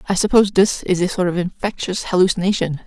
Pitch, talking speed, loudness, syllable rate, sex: 185 Hz, 190 wpm, -18 LUFS, 6.5 syllables/s, female